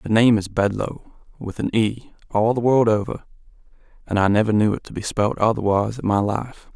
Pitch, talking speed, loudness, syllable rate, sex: 110 Hz, 205 wpm, -20 LUFS, 5.4 syllables/s, male